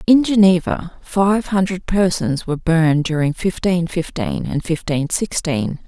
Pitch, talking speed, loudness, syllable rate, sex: 175 Hz, 135 wpm, -18 LUFS, 4.3 syllables/s, female